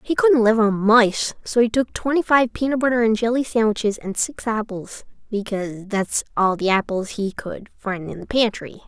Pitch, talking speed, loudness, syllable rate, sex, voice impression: 220 Hz, 195 wpm, -20 LUFS, 4.9 syllables/s, female, very feminine, very young, very thin, tensed, slightly powerful, very bright, hard, clear, fluent, very cute, intellectual, refreshing, slightly sincere, calm, friendly, reassuring, very unique, slightly elegant, sweet, lively, kind, slightly intense, slightly sharp, very light